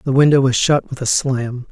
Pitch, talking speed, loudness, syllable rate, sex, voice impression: 130 Hz, 245 wpm, -16 LUFS, 5.1 syllables/s, male, masculine, adult-like, sincere, slightly calm, friendly, kind